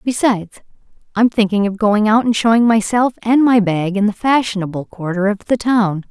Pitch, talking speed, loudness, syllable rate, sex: 215 Hz, 185 wpm, -15 LUFS, 5.2 syllables/s, female